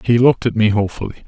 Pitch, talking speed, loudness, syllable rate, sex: 115 Hz, 235 wpm, -16 LUFS, 8.3 syllables/s, male